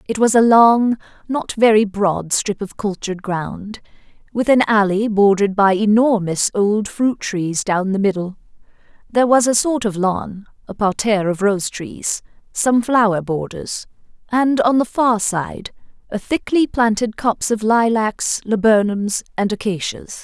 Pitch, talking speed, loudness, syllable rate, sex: 210 Hz, 150 wpm, -17 LUFS, 4.3 syllables/s, female